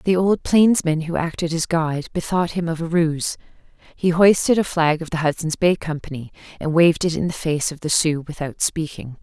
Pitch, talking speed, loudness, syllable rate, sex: 165 Hz, 210 wpm, -20 LUFS, 5.2 syllables/s, female